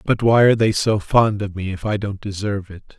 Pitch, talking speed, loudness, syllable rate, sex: 105 Hz, 260 wpm, -19 LUFS, 5.6 syllables/s, male